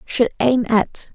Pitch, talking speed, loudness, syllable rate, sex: 230 Hz, 155 wpm, -18 LUFS, 3.4 syllables/s, female